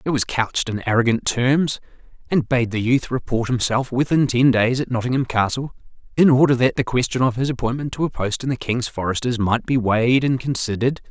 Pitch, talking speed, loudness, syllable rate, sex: 125 Hz, 205 wpm, -20 LUFS, 5.7 syllables/s, male